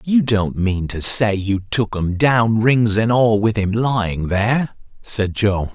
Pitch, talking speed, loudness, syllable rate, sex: 110 Hz, 190 wpm, -17 LUFS, 3.7 syllables/s, male